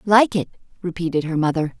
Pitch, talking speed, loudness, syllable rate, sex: 175 Hz, 165 wpm, -21 LUFS, 5.5 syllables/s, female